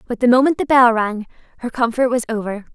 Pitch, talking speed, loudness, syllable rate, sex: 240 Hz, 220 wpm, -17 LUFS, 6.1 syllables/s, female